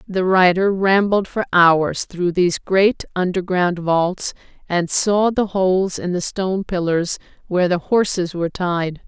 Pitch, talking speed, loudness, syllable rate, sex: 185 Hz, 150 wpm, -18 LUFS, 4.2 syllables/s, female